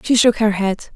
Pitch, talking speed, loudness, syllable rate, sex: 215 Hz, 250 wpm, -17 LUFS, 5.3 syllables/s, female